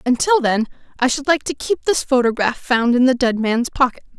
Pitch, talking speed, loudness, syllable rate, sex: 255 Hz, 215 wpm, -18 LUFS, 5.3 syllables/s, female